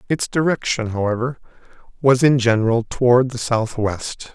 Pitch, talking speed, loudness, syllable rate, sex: 120 Hz, 125 wpm, -19 LUFS, 4.8 syllables/s, male